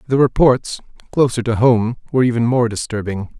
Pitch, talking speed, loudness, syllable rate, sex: 120 Hz, 160 wpm, -17 LUFS, 5.4 syllables/s, male